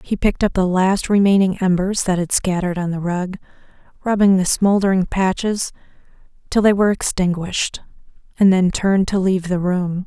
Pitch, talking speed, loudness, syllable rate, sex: 190 Hz, 165 wpm, -18 LUFS, 5.5 syllables/s, female